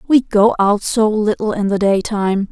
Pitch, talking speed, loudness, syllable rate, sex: 210 Hz, 190 wpm, -15 LUFS, 4.7 syllables/s, female